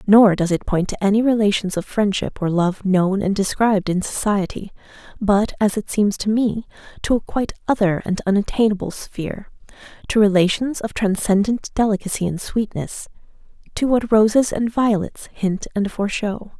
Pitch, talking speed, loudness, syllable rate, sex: 205 Hz, 160 wpm, -19 LUFS, 5.1 syllables/s, female